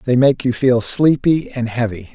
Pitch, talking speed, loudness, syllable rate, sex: 125 Hz, 195 wpm, -16 LUFS, 4.5 syllables/s, male